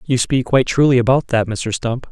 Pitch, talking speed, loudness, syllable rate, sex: 125 Hz, 225 wpm, -16 LUFS, 5.5 syllables/s, male